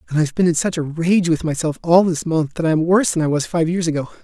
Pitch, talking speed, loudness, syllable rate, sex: 165 Hz, 310 wpm, -18 LUFS, 6.7 syllables/s, male